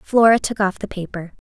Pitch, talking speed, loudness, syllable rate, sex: 205 Hz, 200 wpm, -18 LUFS, 5.6 syllables/s, female